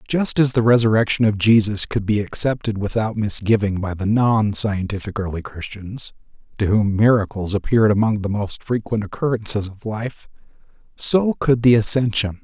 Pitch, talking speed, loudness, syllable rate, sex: 110 Hz, 155 wpm, -19 LUFS, 5.0 syllables/s, male